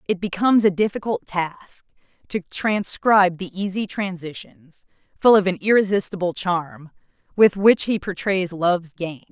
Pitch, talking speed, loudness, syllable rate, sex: 185 Hz, 135 wpm, -20 LUFS, 4.6 syllables/s, female